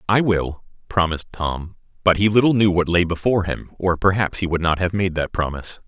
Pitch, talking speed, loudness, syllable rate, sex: 90 Hz, 215 wpm, -20 LUFS, 5.7 syllables/s, male